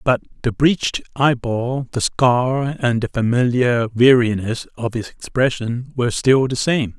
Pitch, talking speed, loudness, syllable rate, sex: 125 Hz, 145 wpm, -18 LUFS, 4.1 syllables/s, male